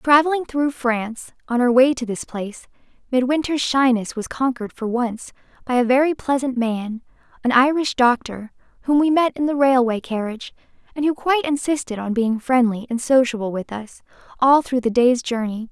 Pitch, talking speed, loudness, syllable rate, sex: 250 Hz, 170 wpm, -20 LUFS, 5.2 syllables/s, female